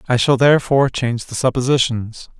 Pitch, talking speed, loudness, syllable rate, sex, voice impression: 130 Hz, 150 wpm, -16 LUFS, 6.1 syllables/s, male, masculine, adult-like, slightly cool, friendly, reassuring, slightly kind